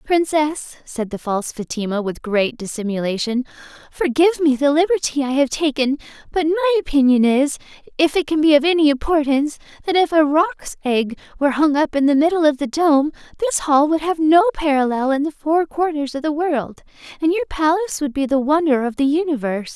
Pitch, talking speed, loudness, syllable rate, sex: 290 Hz, 190 wpm, -18 LUFS, 5.7 syllables/s, female